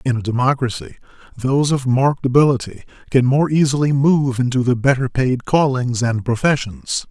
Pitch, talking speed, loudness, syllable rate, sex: 130 Hz, 150 wpm, -17 LUFS, 5.2 syllables/s, male